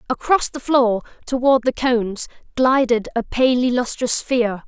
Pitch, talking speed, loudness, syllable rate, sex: 250 Hz, 140 wpm, -19 LUFS, 5.0 syllables/s, female